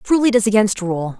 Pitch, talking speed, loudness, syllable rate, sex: 215 Hz, 250 wpm, -17 LUFS, 6.4 syllables/s, female